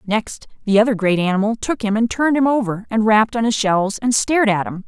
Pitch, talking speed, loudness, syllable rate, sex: 220 Hz, 245 wpm, -17 LUFS, 6.0 syllables/s, female